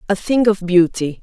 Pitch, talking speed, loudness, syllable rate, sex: 190 Hz, 195 wpm, -16 LUFS, 4.9 syllables/s, female